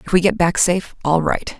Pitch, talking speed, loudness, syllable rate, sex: 175 Hz, 225 wpm, -18 LUFS, 5.7 syllables/s, female